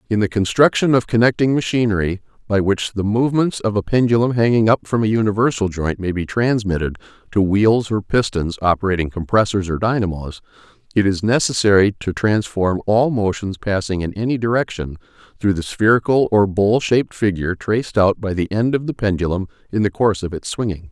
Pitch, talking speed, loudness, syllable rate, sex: 105 Hz, 180 wpm, -18 LUFS, 5.6 syllables/s, male